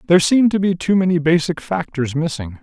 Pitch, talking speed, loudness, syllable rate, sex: 165 Hz, 205 wpm, -17 LUFS, 5.7 syllables/s, male